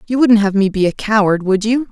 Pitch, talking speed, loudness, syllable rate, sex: 210 Hz, 280 wpm, -14 LUFS, 5.7 syllables/s, female